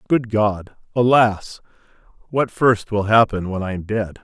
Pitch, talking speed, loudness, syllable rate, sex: 110 Hz, 155 wpm, -19 LUFS, 4.6 syllables/s, male